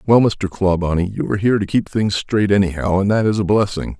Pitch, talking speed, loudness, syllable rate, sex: 100 Hz, 240 wpm, -17 LUFS, 6.0 syllables/s, male